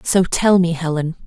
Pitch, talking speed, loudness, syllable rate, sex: 170 Hz, 190 wpm, -17 LUFS, 4.6 syllables/s, female